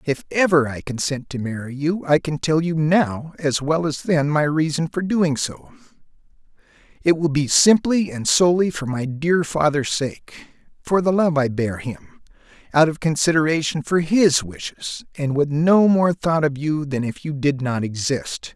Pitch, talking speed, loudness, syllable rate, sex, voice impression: 155 Hz, 185 wpm, -20 LUFS, 4.5 syllables/s, male, masculine, slightly old, slightly thick, tensed, slightly powerful, slightly bright, slightly soft, slightly clear, slightly halting, slightly raspy, slightly cool, intellectual, slightly refreshing, very sincere, slightly calm, slightly friendly, slightly reassuring, slightly unique, slightly elegant, wild, slightly lively, slightly kind, slightly intense